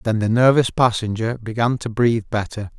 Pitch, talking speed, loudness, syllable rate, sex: 115 Hz, 170 wpm, -19 LUFS, 5.5 syllables/s, male